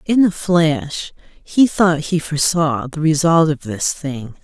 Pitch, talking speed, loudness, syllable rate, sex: 160 Hz, 160 wpm, -17 LUFS, 3.7 syllables/s, female